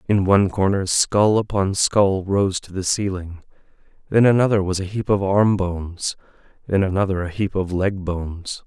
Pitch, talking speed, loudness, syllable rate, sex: 95 Hz, 175 wpm, -20 LUFS, 4.8 syllables/s, male